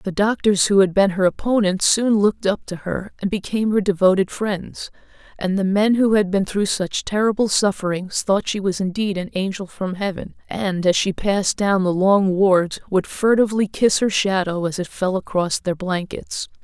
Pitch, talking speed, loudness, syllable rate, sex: 195 Hz, 195 wpm, -19 LUFS, 4.9 syllables/s, female